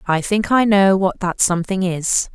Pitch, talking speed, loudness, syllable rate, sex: 190 Hz, 205 wpm, -17 LUFS, 4.6 syllables/s, female